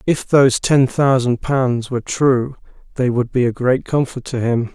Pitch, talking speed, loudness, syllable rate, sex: 130 Hz, 190 wpm, -17 LUFS, 4.5 syllables/s, male